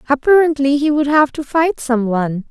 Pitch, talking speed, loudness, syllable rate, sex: 280 Hz, 170 wpm, -15 LUFS, 5.3 syllables/s, female